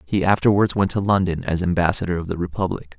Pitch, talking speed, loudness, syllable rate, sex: 90 Hz, 200 wpm, -20 LUFS, 6.3 syllables/s, male